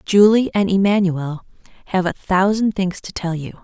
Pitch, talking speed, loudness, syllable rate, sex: 190 Hz, 165 wpm, -18 LUFS, 4.6 syllables/s, female